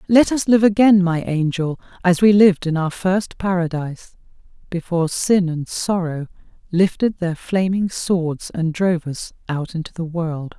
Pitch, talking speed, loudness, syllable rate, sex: 175 Hz, 160 wpm, -19 LUFS, 4.5 syllables/s, female